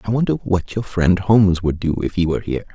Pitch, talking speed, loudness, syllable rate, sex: 95 Hz, 265 wpm, -18 LUFS, 6.3 syllables/s, male